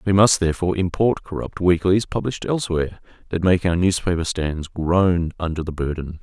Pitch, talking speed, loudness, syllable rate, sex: 90 Hz, 165 wpm, -21 LUFS, 5.6 syllables/s, male